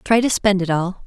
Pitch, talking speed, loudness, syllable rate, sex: 195 Hz, 280 wpm, -18 LUFS, 5.2 syllables/s, female